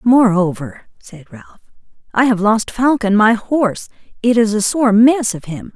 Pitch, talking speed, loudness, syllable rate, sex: 220 Hz, 165 wpm, -14 LUFS, 4.5 syllables/s, female